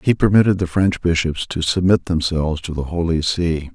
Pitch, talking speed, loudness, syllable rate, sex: 85 Hz, 190 wpm, -18 LUFS, 5.2 syllables/s, male